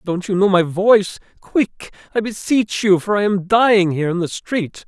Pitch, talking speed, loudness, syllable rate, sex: 195 Hz, 210 wpm, -17 LUFS, 4.9 syllables/s, male